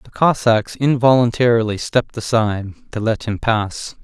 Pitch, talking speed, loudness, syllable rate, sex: 115 Hz, 135 wpm, -17 LUFS, 5.0 syllables/s, male